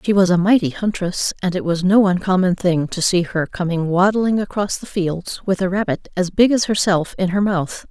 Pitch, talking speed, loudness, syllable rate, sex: 185 Hz, 220 wpm, -18 LUFS, 5.0 syllables/s, female